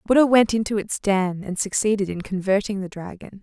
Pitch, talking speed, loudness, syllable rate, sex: 200 Hz, 195 wpm, -22 LUFS, 5.5 syllables/s, female